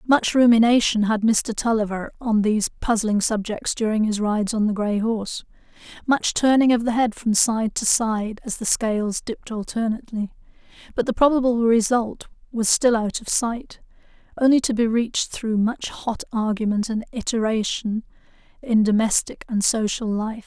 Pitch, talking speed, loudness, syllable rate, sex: 225 Hz, 160 wpm, -21 LUFS, 4.9 syllables/s, female